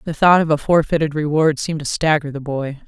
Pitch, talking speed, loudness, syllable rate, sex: 150 Hz, 230 wpm, -17 LUFS, 6.0 syllables/s, female